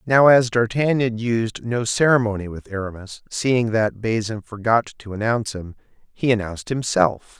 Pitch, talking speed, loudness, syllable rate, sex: 115 Hz, 145 wpm, -20 LUFS, 4.7 syllables/s, male